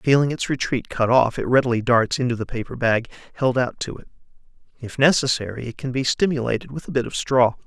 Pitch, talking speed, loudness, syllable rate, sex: 125 Hz, 210 wpm, -21 LUFS, 5.9 syllables/s, male